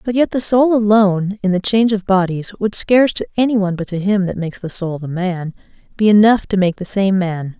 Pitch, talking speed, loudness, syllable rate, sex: 195 Hz, 245 wpm, -16 LUFS, 5.9 syllables/s, female